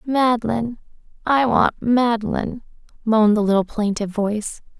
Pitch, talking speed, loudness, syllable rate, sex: 225 Hz, 100 wpm, -20 LUFS, 4.6 syllables/s, female